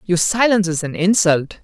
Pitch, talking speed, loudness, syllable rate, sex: 185 Hz, 185 wpm, -16 LUFS, 5.2 syllables/s, male